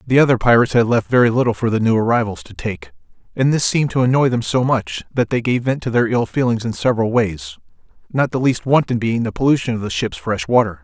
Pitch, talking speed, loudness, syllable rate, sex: 120 Hz, 245 wpm, -17 LUFS, 6.3 syllables/s, male